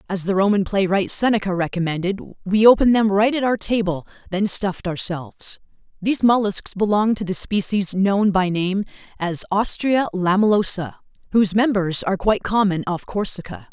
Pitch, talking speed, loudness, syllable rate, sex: 200 Hz, 155 wpm, -20 LUFS, 5.4 syllables/s, female